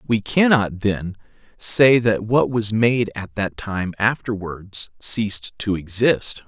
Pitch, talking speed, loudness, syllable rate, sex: 105 Hz, 140 wpm, -20 LUFS, 3.5 syllables/s, male